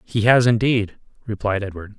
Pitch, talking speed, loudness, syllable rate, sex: 110 Hz, 150 wpm, -19 LUFS, 5.0 syllables/s, male